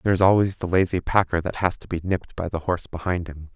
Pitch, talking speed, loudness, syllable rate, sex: 90 Hz, 270 wpm, -23 LUFS, 6.8 syllables/s, male